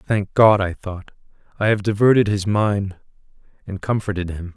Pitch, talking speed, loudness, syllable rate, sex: 100 Hz, 160 wpm, -19 LUFS, 4.9 syllables/s, male